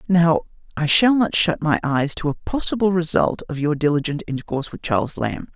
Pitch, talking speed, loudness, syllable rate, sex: 160 Hz, 195 wpm, -20 LUFS, 5.5 syllables/s, male